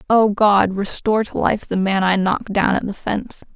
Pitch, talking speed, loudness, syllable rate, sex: 200 Hz, 220 wpm, -18 LUFS, 5.2 syllables/s, female